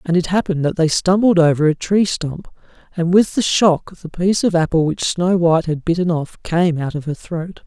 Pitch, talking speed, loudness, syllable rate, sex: 170 Hz, 225 wpm, -17 LUFS, 5.2 syllables/s, male